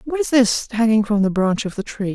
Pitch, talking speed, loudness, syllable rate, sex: 220 Hz, 280 wpm, -18 LUFS, 5.4 syllables/s, female